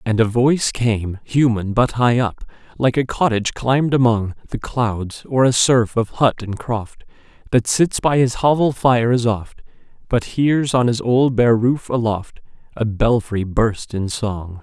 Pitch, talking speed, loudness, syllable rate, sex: 120 Hz, 175 wpm, -18 LUFS, 4.1 syllables/s, male